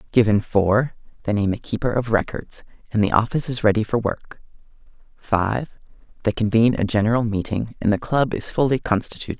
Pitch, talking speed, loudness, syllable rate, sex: 110 Hz, 170 wpm, -21 LUFS, 5.7 syllables/s, male